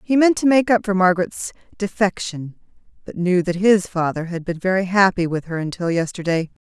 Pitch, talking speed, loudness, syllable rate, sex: 185 Hz, 190 wpm, -19 LUFS, 5.4 syllables/s, female